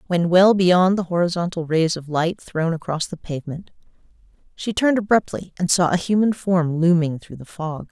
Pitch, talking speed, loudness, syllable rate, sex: 175 Hz, 180 wpm, -20 LUFS, 5.1 syllables/s, female